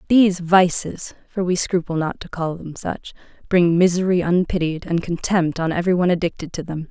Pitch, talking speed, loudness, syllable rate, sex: 175 Hz, 185 wpm, -20 LUFS, 4.6 syllables/s, female